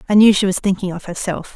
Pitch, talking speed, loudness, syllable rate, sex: 190 Hz, 270 wpm, -17 LUFS, 6.6 syllables/s, female